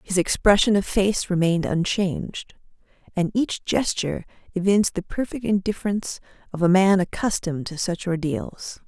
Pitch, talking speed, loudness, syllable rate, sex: 190 Hz, 135 wpm, -23 LUFS, 5.2 syllables/s, female